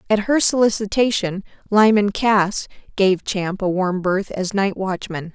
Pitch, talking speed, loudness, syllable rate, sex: 200 Hz, 145 wpm, -19 LUFS, 4.1 syllables/s, female